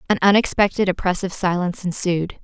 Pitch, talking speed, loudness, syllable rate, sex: 185 Hz, 125 wpm, -19 LUFS, 6.3 syllables/s, female